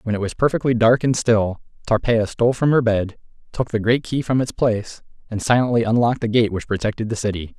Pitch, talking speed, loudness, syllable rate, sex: 115 Hz, 220 wpm, -19 LUFS, 6.0 syllables/s, male